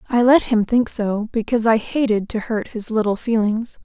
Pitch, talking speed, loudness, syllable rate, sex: 225 Hz, 205 wpm, -19 LUFS, 5.0 syllables/s, female